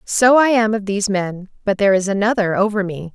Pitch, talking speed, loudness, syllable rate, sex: 205 Hz, 230 wpm, -17 LUFS, 5.8 syllables/s, female